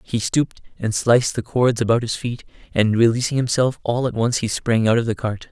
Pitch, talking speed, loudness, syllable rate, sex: 115 Hz, 230 wpm, -20 LUFS, 5.4 syllables/s, male